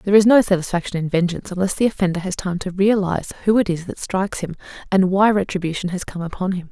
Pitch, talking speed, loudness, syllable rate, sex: 185 Hz, 230 wpm, -20 LUFS, 6.9 syllables/s, female